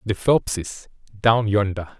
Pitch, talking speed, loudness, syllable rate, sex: 105 Hz, 120 wpm, -21 LUFS, 3.7 syllables/s, male